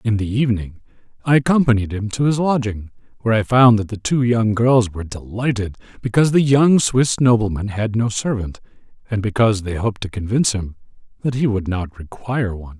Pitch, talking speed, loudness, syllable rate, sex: 110 Hz, 190 wpm, -18 LUFS, 5.8 syllables/s, male